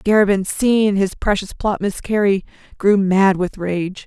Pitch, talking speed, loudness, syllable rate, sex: 195 Hz, 150 wpm, -18 LUFS, 4.2 syllables/s, female